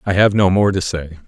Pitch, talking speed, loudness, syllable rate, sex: 95 Hz, 285 wpm, -16 LUFS, 5.5 syllables/s, male